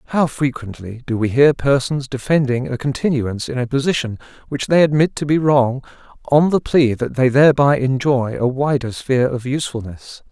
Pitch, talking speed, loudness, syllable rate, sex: 135 Hz, 175 wpm, -17 LUFS, 5.3 syllables/s, male